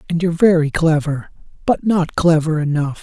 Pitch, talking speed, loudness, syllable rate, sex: 160 Hz, 160 wpm, -17 LUFS, 5.2 syllables/s, male